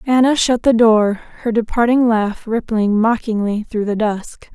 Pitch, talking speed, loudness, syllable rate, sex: 225 Hz, 160 wpm, -16 LUFS, 4.4 syllables/s, female